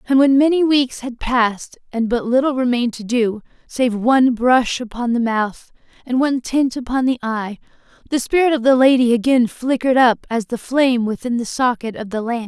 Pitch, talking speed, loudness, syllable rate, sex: 245 Hz, 195 wpm, -17 LUFS, 5.3 syllables/s, female